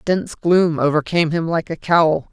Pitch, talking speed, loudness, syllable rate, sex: 165 Hz, 180 wpm, -18 LUFS, 5.0 syllables/s, female